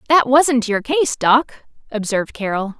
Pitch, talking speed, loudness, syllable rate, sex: 245 Hz, 150 wpm, -17 LUFS, 4.3 syllables/s, female